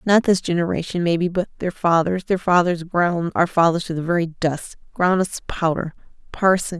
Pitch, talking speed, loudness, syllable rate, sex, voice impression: 175 Hz, 185 wpm, -20 LUFS, 5.2 syllables/s, female, feminine, adult-like, slightly intellectual, calm, slightly sweet